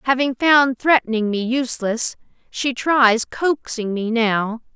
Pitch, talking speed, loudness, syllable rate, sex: 245 Hz, 125 wpm, -19 LUFS, 4.1 syllables/s, female